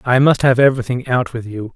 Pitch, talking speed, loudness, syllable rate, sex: 125 Hz, 240 wpm, -15 LUFS, 6.1 syllables/s, male